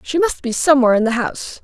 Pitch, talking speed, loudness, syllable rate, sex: 260 Hz, 255 wpm, -16 LUFS, 7.2 syllables/s, female